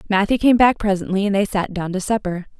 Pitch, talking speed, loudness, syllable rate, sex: 200 Hz, 230 wpm, -19 LUFS, 6.1 syllables/s, female